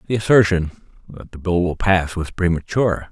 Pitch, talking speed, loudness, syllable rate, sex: 90 Hz, 175 wpm, -19 LUFS, 5.5 syllables/s, male